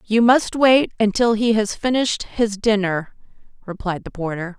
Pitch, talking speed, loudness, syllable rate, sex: 215 Hz, 155 wpm, -19 LUFS, 4.6 syllables/s, female